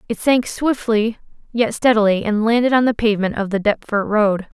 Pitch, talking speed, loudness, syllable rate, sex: 220 Hz, 185 wpm, -17 LUFS, 5.3 syllables/s, female